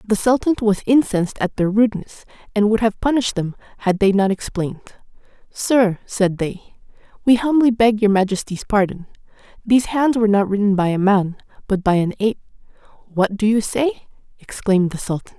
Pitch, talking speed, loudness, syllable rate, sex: 210 Hz, 170 wpm, -18 LUFS, 5.6 syllables/s, female